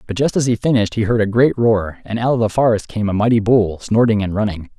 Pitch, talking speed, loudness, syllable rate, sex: 110 Hz, 275 wpm, -17 LUFS, 6.2 syllables/s, male